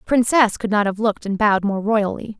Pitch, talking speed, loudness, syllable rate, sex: 210 Hz, 250 wpm, -19 LUFS, 6.0 syllables/s, female